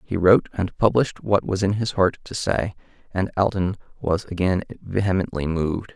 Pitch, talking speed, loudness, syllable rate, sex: 95 Hz, 170 wpm, -22 LUFS, 5.2 syllables/s, male